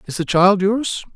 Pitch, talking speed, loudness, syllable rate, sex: 195 Hz, 210 wpm, -17 LUFS, 4.4 syllables/s, male